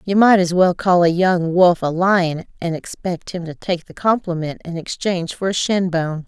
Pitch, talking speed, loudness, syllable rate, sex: 175 Hz, 220 wpm, -18 LUFS, 4.7 syllables/s, female